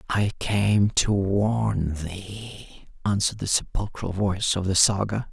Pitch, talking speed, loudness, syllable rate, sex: 100 Hz, 135 wpm, -24 LUFS, 3.8 syllables/s, male